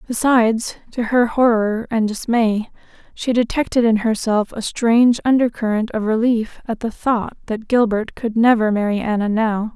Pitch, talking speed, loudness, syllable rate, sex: 225 Hz, 155 wpm, -18 LUFS, 4.7 syllables/s, female